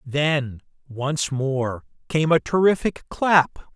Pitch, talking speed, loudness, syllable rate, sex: 145 Hz, 110 wpm, -22 LUFS, 3.1 syllables/s, male